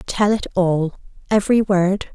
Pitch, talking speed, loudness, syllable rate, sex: 190 Hz, 110 wpm, -19 LUFS, 4.5 syllables/s, female